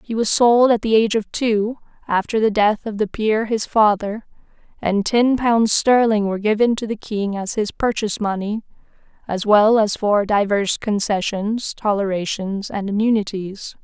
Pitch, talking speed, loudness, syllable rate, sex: 215 Hz, 165 wpm, -19 LUFS, 4.6 syllables/s, female